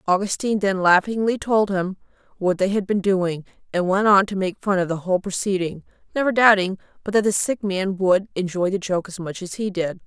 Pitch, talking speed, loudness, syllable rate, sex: 190 Hz, 215 wpm, -21 LUFS, 5.5 syllables/s, female